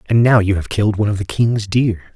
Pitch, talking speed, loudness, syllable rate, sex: 105 Hz, 280 wpm, -16 LUFS, 6.2 syllables/s, male